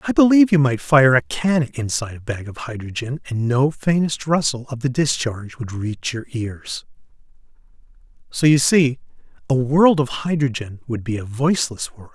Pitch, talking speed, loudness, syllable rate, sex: 130 Hz, 175 wpm, -19 LUFS, 5.1 syllables/s, male